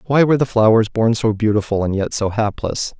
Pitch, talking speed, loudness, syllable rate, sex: 110 Hz, 220 wpm, -17 LUFS, 5.7 syllables/s, male